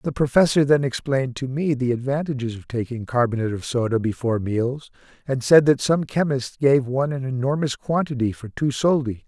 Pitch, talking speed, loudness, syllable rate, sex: 130 Hz, 180 wpm, -22 LUFS, 5.6 syllables/s, male